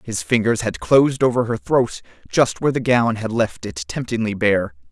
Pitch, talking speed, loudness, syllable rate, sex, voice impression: 115 Hz, 195 wpm, -19 LUFS, 5.0 syllables/s, male, masculine, adult-like, cool, slightly sincere, slightly friendly, reassuring